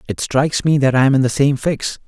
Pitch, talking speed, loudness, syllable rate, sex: 135 Hz, 290 wpm, -16 LUFS, 5.9 syllables/s, male